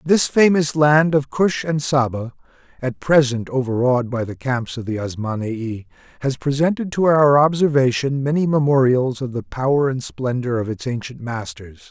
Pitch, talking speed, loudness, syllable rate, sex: 135 Hz, 160 wpm, -19 LUFS, 4.8 syllables/s, male